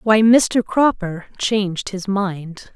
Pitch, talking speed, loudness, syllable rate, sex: 200 Hz, 130 wpm, -18 LUFS, 3.2 syllables/s, female